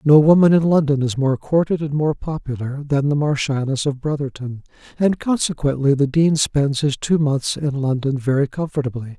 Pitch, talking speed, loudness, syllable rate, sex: 145 Hz, 175 wpm, -19 LUFS, 5.1 syllables/s, male